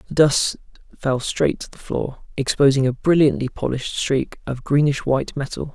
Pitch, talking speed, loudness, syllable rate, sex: 140 Hz, 165 wpm, -20 LUFS, 5.0 syllables/s, male